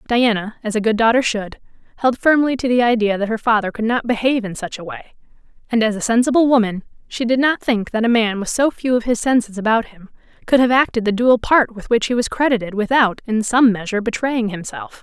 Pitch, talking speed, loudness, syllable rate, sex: 230 Hz, 230 wpm, -17 LUFS, 6.0 syllables/s, female